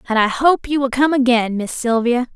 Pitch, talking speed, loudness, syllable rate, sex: 250 Hz, 230 wpm, -17 LUFS, 5.2 syllables/s, female